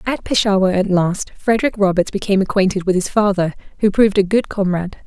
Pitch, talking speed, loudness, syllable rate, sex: 195 Hz, 190 wpm, -17 LUFS, 6.5 syllables/s, female